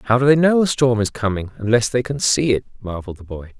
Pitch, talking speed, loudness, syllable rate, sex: 120 Hz, 265 wpm, -18 LUFS, 6.3 syllables/s, male